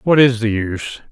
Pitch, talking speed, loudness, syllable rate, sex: 115 Hz, 215 wpm, -17 LUFS, 5.3 syllables/s, male